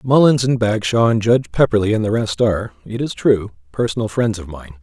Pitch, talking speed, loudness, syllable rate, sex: 105 Hz, 210 wpm, -17 LUFS, 5.8 syllables/s, male